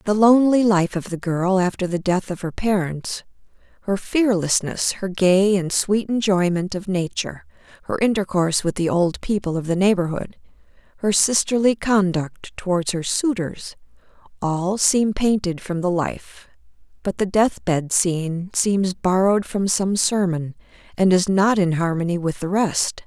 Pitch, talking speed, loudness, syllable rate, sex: 190 Hz, 150 wpm, -20 LUFS, 4.5 syllables/s, female